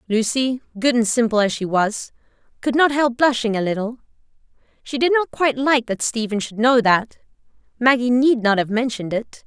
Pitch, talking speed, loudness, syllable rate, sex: 240 Hz, 185 wpm, -19 LUFS, 5.3 syllables/s, female